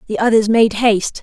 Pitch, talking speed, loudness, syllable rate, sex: 220 Hz, 195 wpm, -14 LUFS, 5.7 syllables/s, female